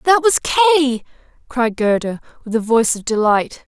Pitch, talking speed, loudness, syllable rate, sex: 255 Hz, 160 wpm, -16 LUFS, 5.3 syllables/s, female